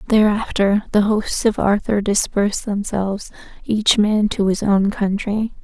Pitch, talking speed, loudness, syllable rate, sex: 205 Hz, 140 wpm, -18 LUFS, 4.3 syllables/s, female